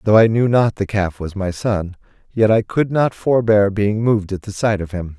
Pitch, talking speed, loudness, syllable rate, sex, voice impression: 105 Hz, 245 wpm, -17 LUFS, 4.9 syllables/s, male, masculine, adult-like, slightly thick, cool, sincere, reassuring